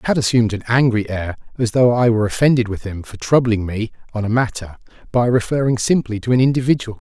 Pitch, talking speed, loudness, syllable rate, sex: 115 Hz, 210 wpm, -18 LUFS, 6.3 syllables/s, male